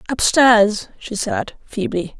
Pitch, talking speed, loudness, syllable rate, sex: 225 Hz, 135 wpm, -17 LUFS, 3.3 syllables/s, female